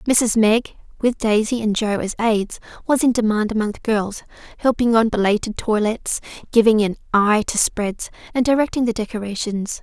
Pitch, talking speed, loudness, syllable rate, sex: 220 Hz, 165 wpm, -19 LUFS, 5.1 syllables/s, female